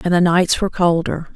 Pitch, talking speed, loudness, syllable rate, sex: 175 Hz, 220 wpm, -17 LUFS, 5.7 syllables/s, female